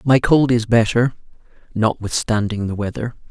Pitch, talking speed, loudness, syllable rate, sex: 115 Hz, 125 wpm, -18 LUFS, 4.8 syllables/s, male